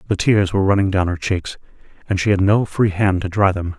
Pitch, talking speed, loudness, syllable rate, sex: 95 Hz, 255 wpm, -18 LUFS, 5.8 syllables/s, male